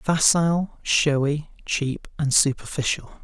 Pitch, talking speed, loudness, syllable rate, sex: 150 Hz, 95 wpm, -22 LUFS, 3.8 syllables/s, male